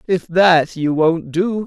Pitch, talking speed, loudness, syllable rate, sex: 170 Hz, 180 wpm, -16 LUFS, 3.3 syllables/s, male